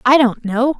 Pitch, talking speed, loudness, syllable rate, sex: 250 Hz, 225 wpm, -15 LUFS, 4.5 syllables/s, female